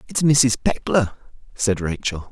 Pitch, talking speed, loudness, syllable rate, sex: 115 Hz, 130 wpm, -20 LUFS, 4.1 syllables/s, male